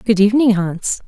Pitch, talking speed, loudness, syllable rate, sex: 210 Hz, 170 wpm, -15 LUFS, 5.4 syllables/s, female